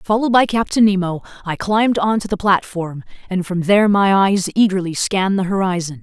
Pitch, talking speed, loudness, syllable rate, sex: 195 Hz, 180 wpm, -17 LUFS, 5.7 syllables/s, female